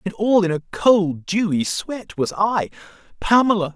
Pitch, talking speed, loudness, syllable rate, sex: 195 Hz, 160 wpm, -19 LUFS, 4.2 syllables/s, male